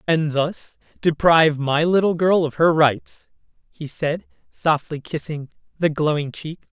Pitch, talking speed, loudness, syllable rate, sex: 155 Hz, 140 wpm, -20 LUFS, 4.0 syllables/s, female